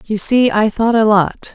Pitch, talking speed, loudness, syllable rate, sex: 215 Hz, 235 wpm, -14 LUFS, 4.2 syllables/s, female